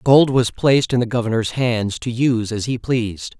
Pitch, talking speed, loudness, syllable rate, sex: 120 Hz, 245 wpm, -19 LUFS, 5.2 syllables/s, male